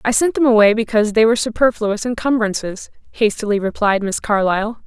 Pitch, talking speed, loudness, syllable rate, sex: 220 Hz, 160 wpm, -16 LUFS, 6.0 syllables/s, female